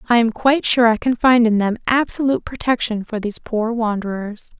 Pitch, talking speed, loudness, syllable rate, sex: 230 Hz, 195 wpm, -18 LUFS, 5.7 syllables/s, female